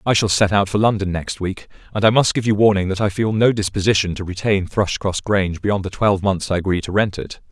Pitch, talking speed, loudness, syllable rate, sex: 100 Hz, 255 wpm, -18 LUFS, 5.9 syllables/s, male